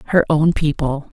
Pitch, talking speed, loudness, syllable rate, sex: 150 Hz, 150 wpm, -18 LUFS, 4.8 syllables/s, female